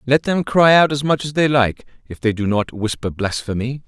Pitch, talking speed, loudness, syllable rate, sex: 125 Hz, 230 wpm, -18 LUFS, 5.1 syllables/s, male